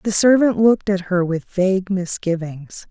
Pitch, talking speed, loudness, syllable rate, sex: 190 Hz, 165 wpm, -18 LUFS, 4.6 syllables/s, female